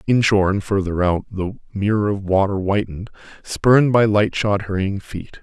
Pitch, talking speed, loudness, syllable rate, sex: 100 Hz, 155 wpm, -19 LUFS, 5.1 syllables/s, male